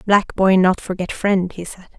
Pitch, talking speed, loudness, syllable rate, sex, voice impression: 185 Hz, 210 wpm, -18 LUFS, 4.6 syllables/s, female, feminine, adult-like, slightly tensed, powerful, slightly soft, slightly raspy, intellectual, calm, slightly friendly, elegant, slightly modest